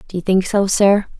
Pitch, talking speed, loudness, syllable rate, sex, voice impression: 195 Hz, 250 wpm, -16 LUFS, 5.2 syllables/s, female, very feminine, young, thin, slightly relaxed, weak, slightly dark, soft, slightly muffled, fluent, slightly raspy, very cute, intellectual, refreshing, slightly sincere, very calm, very friendly, very reassuring, unique, very elegant, wild, very sweet, slightly lively, very kind, slightly intense, slightly modest, light